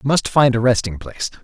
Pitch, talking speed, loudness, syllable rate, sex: 120 Hz, 250 wpm, -17 LUFS, 6.5 syllables/s, male